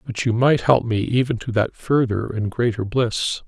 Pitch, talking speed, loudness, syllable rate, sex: 115 Hz, 205 wpm, -20 LUFS, 4.5 syllables/s, male